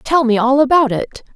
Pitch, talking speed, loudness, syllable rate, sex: 265 Hz, 220 wpm, -14 LUFS, 4.9 syllables/s, female